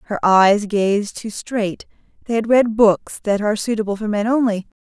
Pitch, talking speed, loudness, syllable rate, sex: 210 Hz, 185 wpm, -18 LUFS, 4.7 syllables/s, female